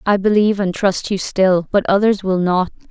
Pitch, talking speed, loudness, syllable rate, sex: 195 Hz, 205 wpm, -16 LUFS, 5.0 syllables/s, female